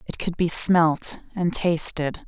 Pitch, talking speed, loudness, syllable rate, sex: 170 Hz, 160 wpm, -19 LUFS, 3.5 syllables/s, female